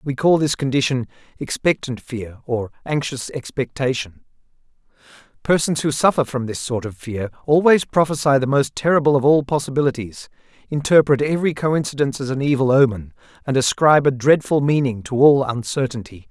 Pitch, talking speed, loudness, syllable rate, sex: 135 Hz, 145 wpm, -19 LUFS, 5.5 syllables/s, male